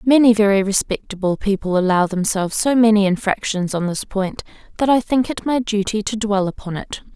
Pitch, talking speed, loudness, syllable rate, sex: 205 Hz, 185 wpm, -18 LUFS, 5.4 syllables/s, female